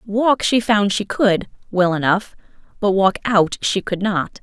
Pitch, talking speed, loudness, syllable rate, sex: 200 Hz, 175 wpm, -18 LUFS, 3.9 syllables/s, female